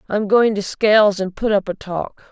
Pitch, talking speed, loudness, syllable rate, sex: 205 Hz, 235 wpm, -18 LUFS, 4.8 syllables/s, female